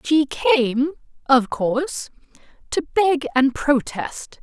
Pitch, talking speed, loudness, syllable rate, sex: 280 Hz, 110 wpm, -20 LUFS, 3.1 syllables/s, female